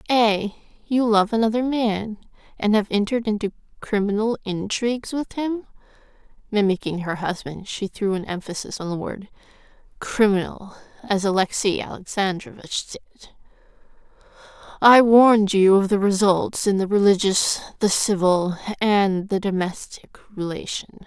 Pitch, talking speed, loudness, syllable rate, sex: 205 Hz, 120 wpm, -21 LUFS, 4.2 syllables/s, female